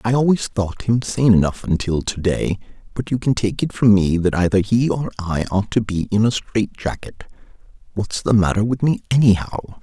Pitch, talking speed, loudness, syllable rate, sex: 105 Hz, 195 wpm, -19 LUFS, 5.1 syllables/s, male